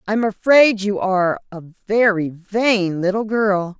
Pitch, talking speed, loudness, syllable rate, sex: 200 Hz, 140 wpm, -17 LUFS, 3.7 syllables/s, female